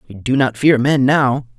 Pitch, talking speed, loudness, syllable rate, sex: 130 Hz, 225 wpm, -15 LUFS, 4.6 syllables/s, male